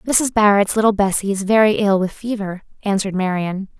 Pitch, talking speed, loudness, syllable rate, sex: 200 Hz, 175 wpm, -17 LUFS, 5.7 syllables/s, female